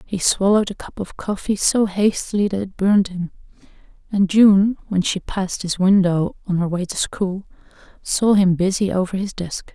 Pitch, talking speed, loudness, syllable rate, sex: 195 Hz, 185 wpm, -19 LUFS, 4.9 syllables/s, female